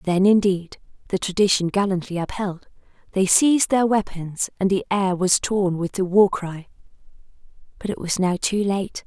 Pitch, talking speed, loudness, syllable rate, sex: 190 Hz, 160 wpm, -21 LUFS, 4.7 syllables/s, female